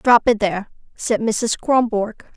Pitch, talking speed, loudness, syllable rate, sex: 225 Hz, 155 wpm, -19 LUFS, 4.2 syllables/s, female